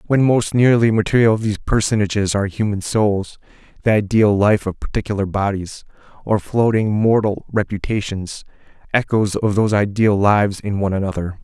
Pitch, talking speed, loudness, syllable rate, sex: 105 Hz, 125 wpm, -18 LUFS, 5.4 syllables/s, male